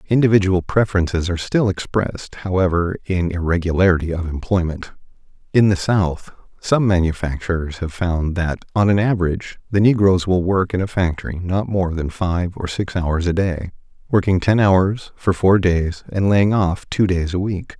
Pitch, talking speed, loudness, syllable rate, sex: 90 Hz, 170 wpm, -19 LUFS, 5.0 syllables/s, male